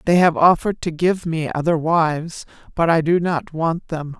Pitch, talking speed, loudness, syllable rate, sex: 165 Hz, 200 wpm, -19 LUFS, 4.8 syllables/s, female